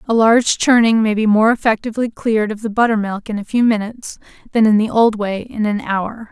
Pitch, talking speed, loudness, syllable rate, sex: 220 Hz, 230 wpm, -16 LUFS, 5.6 syllables/s, female